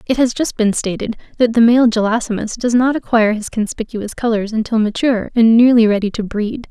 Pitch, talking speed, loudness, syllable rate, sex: 225 Hz, 195 wpm, -15 LUFS, 5.7 syllables/s, female